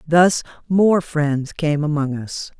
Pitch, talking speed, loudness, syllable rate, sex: 155 Hz, 140 wpm, -19 LUFS, 3.3 syllables/s, female